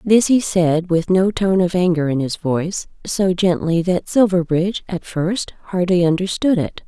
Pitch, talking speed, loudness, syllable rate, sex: 180 Hz, 165 wpm, -18 LUFS, 4.5 syllables/s, female